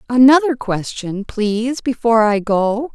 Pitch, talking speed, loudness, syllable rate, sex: 230 Hz, 120 wpm, -16 LUFS, 4.3 syllables/s, female